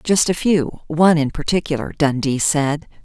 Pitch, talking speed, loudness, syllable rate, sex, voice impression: 155 Hz, 140 wpm, -18 LUFS, 4.9 syllables/s, female, feminine, adult-like, slightly fluent, calm, elegant